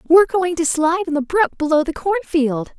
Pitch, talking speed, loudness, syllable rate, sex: 325 Hz, 215 wpm, -18 LUFS, 5.6 syllables/s, female